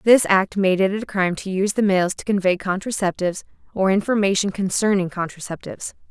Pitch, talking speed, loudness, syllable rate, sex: 195 Hz, 165 wpm, -20 LUFS, 6.0 syllables/s, female